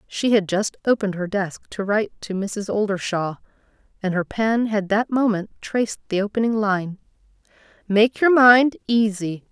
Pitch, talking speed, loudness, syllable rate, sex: 210 Hz, 160 wpm, -21 LUFS, 4.8 syllables/s, female